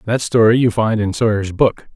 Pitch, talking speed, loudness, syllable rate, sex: 110 Hz, 215 wpm, -16 LUFS, 5.1 syllables/s, male